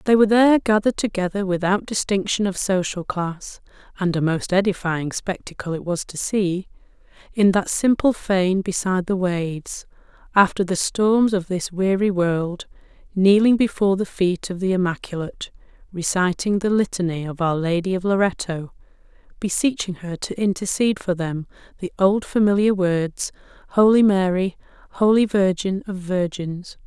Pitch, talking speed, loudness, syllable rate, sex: 190 Hz, 145 wpm, -21 LUFS, 4.5 syllables/s, female